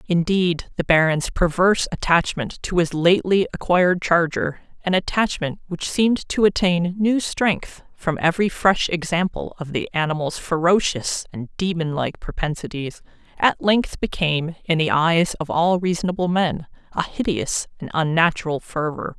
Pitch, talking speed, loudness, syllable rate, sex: 170 Hz, 135 wpm, -21 LUFS, 4.7 syllables/s, female